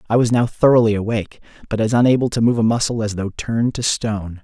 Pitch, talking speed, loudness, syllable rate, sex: 110 Hz, 230 wpm, -18 LUFS, 6.6 syllables/s, male